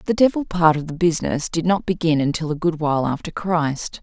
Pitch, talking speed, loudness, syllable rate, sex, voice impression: 165 Hz, 225 wpm, -20 LUFS, 5.7 syllables/s, female, very feminine, very adult-like, slightly intellectual, slightly calm, slightly elegant